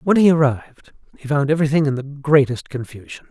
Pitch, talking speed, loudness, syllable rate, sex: 145 Hz, 180 wpm, -18 LUFS, 6.1 syllables/s, male